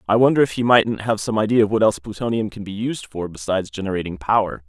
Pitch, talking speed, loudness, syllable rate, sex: 105 Hz, 245 wpm, -20 LUFS, 6.7 syllables/s, male